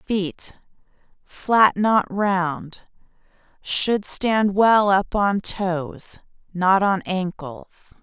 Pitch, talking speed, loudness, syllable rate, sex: 195 Hz, 90 wpm, -20 LUFS, 2.2 syllables/s, female